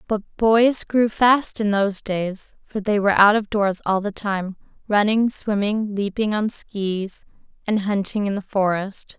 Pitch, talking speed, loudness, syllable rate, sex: 205 Hz, 170 wpm, -21 LUFS, 4.1 syllables/s, female